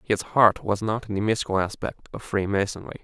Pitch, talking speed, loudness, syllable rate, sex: 100 Hz, 200 wpm, -24 LUFS, 5.6 syllables/s, male